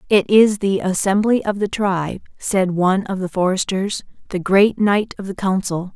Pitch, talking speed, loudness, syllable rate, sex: 195 Hz, 180 wpm, -18 LUFS, 4.8 syllables/s, female